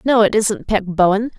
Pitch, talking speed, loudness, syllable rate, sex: 210 Hz, 215 wpm, -16 LUFS, 4.8 syllables/s, female